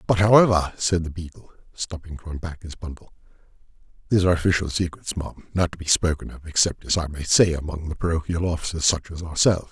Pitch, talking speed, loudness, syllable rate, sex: 85 Hz, 200 wpm, -23 LUFS, 6.4 syllables/s, male